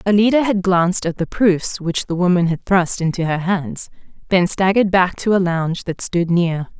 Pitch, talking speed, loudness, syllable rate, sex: 180 Hz, 205 wpm, -17 LUFS, 5.0 syllables/s, female